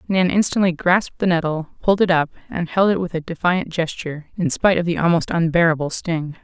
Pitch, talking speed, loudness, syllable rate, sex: 170 Hz, 205 wpm, -19 LUFS, 6.0 syllables/s, female